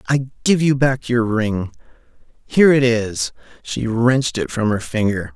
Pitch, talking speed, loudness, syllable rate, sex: 120 Hz, 155 wpm, -18 LUFS, 4.5 syllables/s, male